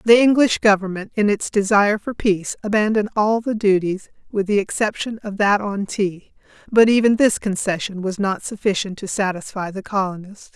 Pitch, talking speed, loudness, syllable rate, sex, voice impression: 205 Hz, 170 wpm, -19 LUFS, 5.3 syllables/s, female, feminine, middle-aged, slightly relaxed, powerful, slightly soft, clear, intellectual, lively, slightly intense, sharp